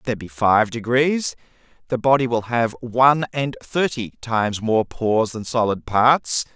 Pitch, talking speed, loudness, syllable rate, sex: 120 Hz, 165 wpm, -20 LUFS, 4.5 syllables/s, male